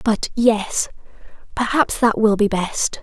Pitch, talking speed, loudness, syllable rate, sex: 220 Hz, 120 wpm, -19 LUFS, 3.7 syllables/s, female